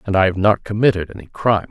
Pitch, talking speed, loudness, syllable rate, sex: 100 Hz, 245 wpm, -17 LUFS, 7.1 syllables/s, male